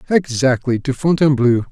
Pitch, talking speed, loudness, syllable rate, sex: 135 Hz, 105 wpm, -16 LUFS, 5.4 syllables/s, male